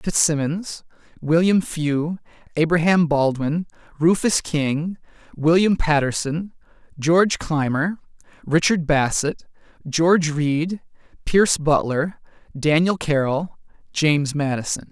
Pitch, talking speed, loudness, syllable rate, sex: 160 Hz, 85 wpm, -20 LUFS, 3.8 syllables/s, male